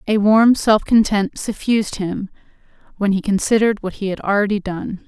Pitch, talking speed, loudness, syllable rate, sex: 205 Hz, 165 wpm, -18 LUFS, 5.2 syllables/s, female